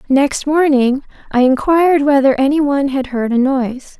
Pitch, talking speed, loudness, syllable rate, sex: 275 Hz, 165 wpm, -14 LUFS, 5.1 syllables/s, female